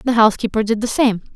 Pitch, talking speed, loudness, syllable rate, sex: 220 Hz, 220 wpm, -17 LUFS, 7.0 syllables/s, female